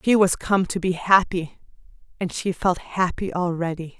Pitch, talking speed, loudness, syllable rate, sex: 180 Hz, 165 wpm, -22 LUFS, 4.6 syllables/s, female